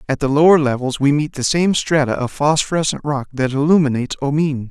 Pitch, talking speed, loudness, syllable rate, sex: 145 Hz, 190 wpm, -17 LUFS, 5.8 syllables/s, male